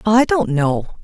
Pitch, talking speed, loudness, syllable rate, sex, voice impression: 200 Hz, 175 wpm, -17 LUFS, 3.9 syllables/s, female, feminine, slightly middle-aged, tensed, powerful, soft, clear, intellectual, calm, reassuring, elegant, lively, slightly sharp